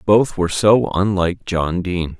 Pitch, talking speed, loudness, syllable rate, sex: 95 Hz, 165 wpm, -18 LUFS, 5.0 syllables/s, male